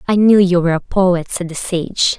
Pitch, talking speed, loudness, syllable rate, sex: 180 Hz, 245 wpm, -15 LUFS, 4.9 syllables/s, female